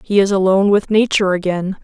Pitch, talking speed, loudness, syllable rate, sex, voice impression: 195 Hz, 195 wpm, -15 LUFS, 6.4 syllables/s, female, slightly feminine, slightly adult-like, slightly soft, slightly muffled, friendly, reassuring